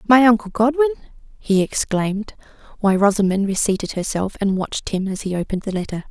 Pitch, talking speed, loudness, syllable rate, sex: 205 Hz, 165 wpm, -20 LUFS, 6.2 syllables/s, female